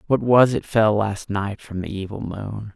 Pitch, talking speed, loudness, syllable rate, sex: 105 Hz, 220 wpm, -21 LUFS, 4.3 syllables/s, male